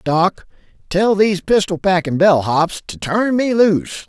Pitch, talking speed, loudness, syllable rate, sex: 185 Hz, 145 wpm, -16 LUFS, 4.3 syllables/s, female